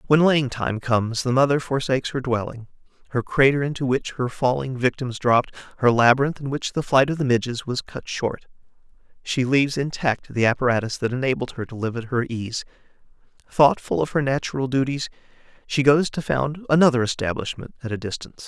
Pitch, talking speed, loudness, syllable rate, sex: 130 Hz, 180 wpm, -22 LUFS, 5.8 syllables/s, male